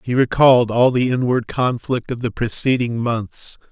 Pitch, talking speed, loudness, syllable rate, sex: 120 Hz, 160 wpm, -18 LUFS, 4.6 syllables/s, male